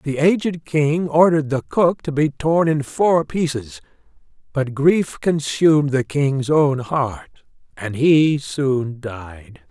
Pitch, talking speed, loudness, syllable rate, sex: 145 Hz, 140 wpm, -18 LUFS, 3.5 syllables/s, male